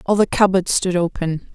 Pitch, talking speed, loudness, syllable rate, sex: 185 Hz, 195 wpm, -18 LUFS, 4.9 syllables/s, female